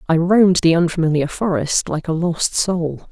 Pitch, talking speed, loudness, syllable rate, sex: 170 Hz, 175 wpm, -17 LUFS, 4.8 syllables/s, female